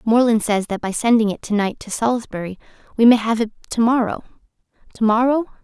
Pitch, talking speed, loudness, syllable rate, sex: 225 Hz, 160 wpm, -19 LUFS, 6.1 syllables/s, female